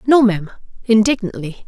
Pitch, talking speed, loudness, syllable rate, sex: 215 Hz, 105 wpm, -16 LUFS, 3.9 syllables/s, female